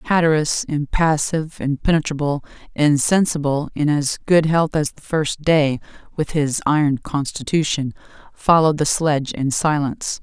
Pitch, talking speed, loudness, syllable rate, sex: 150 Hz, 125 wpm, -19 LUFS, 4.8 syllables/s, female